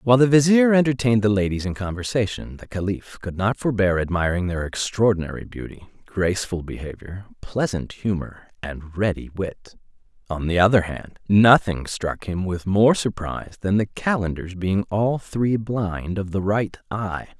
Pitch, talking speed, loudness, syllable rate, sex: 100 Hz, 155 wpm, -22 LUFS, 4.8 syllables/s, male